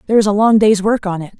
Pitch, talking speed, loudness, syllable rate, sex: 205 Hz, 345 wpm, -14 LUFS, 7.3 syllables/s, female